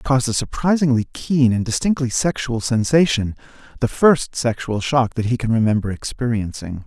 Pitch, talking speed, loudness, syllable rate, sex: 120 Hz, 155 wpm, -19 LUFS, 5.2 syllables/s, male